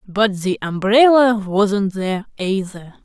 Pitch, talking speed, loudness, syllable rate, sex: 205 Hz, 120 wpm, -17 LUFS, 3.8 syllables/s, female